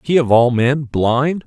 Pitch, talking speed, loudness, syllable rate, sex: 135 Hz, 205 wpm, -15 LUFS, 3.7 syllables/s, male